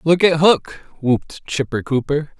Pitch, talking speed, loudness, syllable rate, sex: 150 Hz, 150 wpm, -18 LUFS, 4.3 syllables/s, male